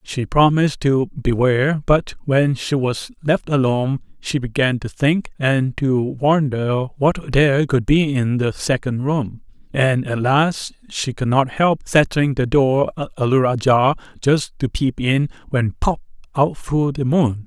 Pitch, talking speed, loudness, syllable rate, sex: 135 Hz, 160 wpm, -19 LUFS, 4.0 syllables/s, male